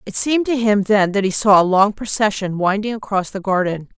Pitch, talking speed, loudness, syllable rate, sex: 205 Hz, 225 wpm, -17 LUFS, 5.5 syllables/s, female